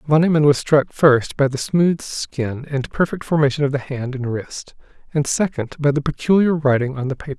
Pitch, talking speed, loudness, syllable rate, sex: 145 Hz, 210 wpm, -19 LUFS, 5.1 syllables/s, male